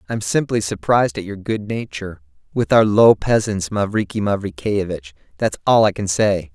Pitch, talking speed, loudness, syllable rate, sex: 100 Hz, 165 wpm, -18 LUFS, 5.1 syllables/s, male